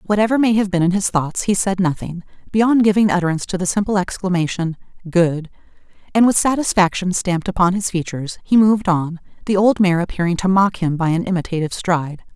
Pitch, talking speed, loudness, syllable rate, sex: 185 Hz, 190 wpm, -18 LUFS, 6.2 syllables/s, female